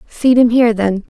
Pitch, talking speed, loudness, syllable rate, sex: 230 Hz, 210 wpm, -13 LUFS, 5.1 syllables/s, female